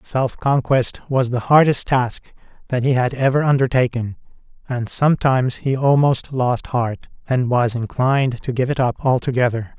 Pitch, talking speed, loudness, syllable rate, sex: 130 Hz, 155 wpm, -18 LUFS, 4.7 syllables/s, male